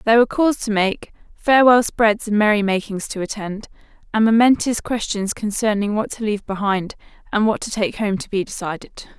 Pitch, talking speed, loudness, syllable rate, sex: 215 Hz, 185 wpm, -19 LUFS, 5.6 syllables/s, female